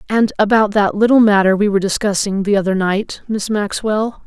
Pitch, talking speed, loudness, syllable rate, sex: 205 Hz, 185 wpm, -15 LUFS, 5.3 syllables/s, female